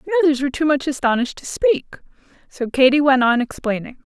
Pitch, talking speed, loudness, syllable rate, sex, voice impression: 280 Hz, 190 wpm, -18 LUFS, 6.3 syllables/s, female, very feminine, slightly young, very adult-like, very thin, slightly relaxed, slightly weak, slightly dark, soft, slightly muffled, fluent, very cute, intellectual, refreshing, very sincere, very calm, friendly, reassuring, very unique, elegant, slightly wild, very sweet, slightly lively, very kind, slightly sharp, modest, light